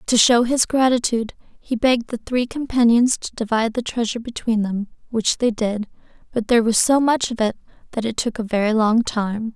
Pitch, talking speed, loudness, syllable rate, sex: 230 Hz, 200 wpm, -20 LUFS, 5.5 syllables/s, female